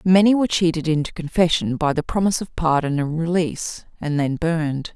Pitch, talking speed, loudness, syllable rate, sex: 165 Hz, 180 wpm, -21 LUFS, 5.8 syllables/s, female